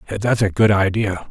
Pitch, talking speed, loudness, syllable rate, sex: 100 Hz, 185 wpm, -18 LUFS, 4.6 syllables/s, male